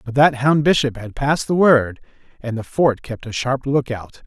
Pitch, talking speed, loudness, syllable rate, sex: 130 Hz, 210 wpm, -18 LUFS, 4.8 syllables/s, male